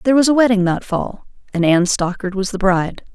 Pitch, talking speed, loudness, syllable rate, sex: 200 Hz, 230 wpm, -17 LUFS, 6.3 syllables/s, female